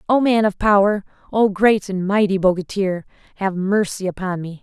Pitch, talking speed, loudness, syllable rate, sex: 195 Hz, 170 wpm, -19 LUFS, 5.0 syllables/s, female